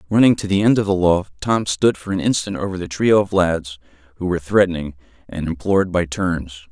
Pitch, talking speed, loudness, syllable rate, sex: 90 Hz, 215 wpm, -19 LUFS, 5.7 syllables/s, male